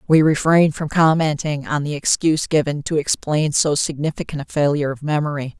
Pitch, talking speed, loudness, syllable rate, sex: 150 Hz, 170 wpm, -19 LUFS, 5.5 syllables/s, female